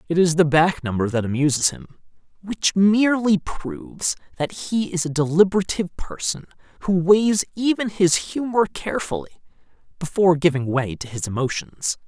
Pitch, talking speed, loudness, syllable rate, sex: 170 Hz, 140 wpm, -21 LUFS, 5.1 syllables/s, male